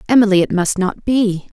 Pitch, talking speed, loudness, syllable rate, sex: 205 Hz, 190 wpm, -16 LUFS, 5.2 syllables/s, female